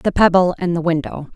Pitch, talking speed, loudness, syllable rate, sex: 175 Hz, 220 wpm, -17 LUFS, 5.7 syllables/s, female